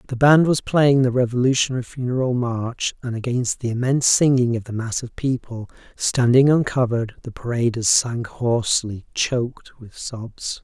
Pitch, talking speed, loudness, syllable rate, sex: 125 Hz, 150 wpm, -20 LUFS, 4.8 syllables/s, male